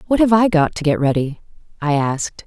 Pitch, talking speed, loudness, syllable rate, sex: 170 Hz, 220 wpm, -17 LUFS, 5.8 syllables/s, female